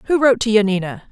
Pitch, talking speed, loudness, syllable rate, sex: 220 Hz, 215 wpm, -16 LUFS, 6.9 syllables/s, female